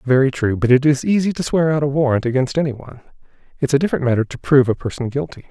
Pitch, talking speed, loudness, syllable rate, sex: 135 Hz, 250 wpm, -18 LUFS, 7.3 syllables/s, male